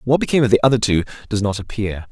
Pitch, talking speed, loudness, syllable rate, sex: 115 Hz, 255 wpm, -18 LUFS, 7.8 syllables/s, male